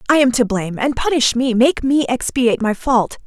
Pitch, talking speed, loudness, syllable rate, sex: 245 Hz, 220 wpm, -16 LUFS, 5.4 syllables/s, female